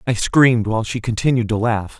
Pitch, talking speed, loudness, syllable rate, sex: 115 Hz, 210 wpm, -18 LUFS, 6.0 syllables/s, male